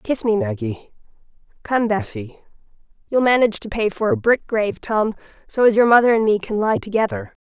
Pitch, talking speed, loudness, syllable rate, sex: 225 Hz, 170 wpm, -19 LUFS, 5.7 syllables/s, female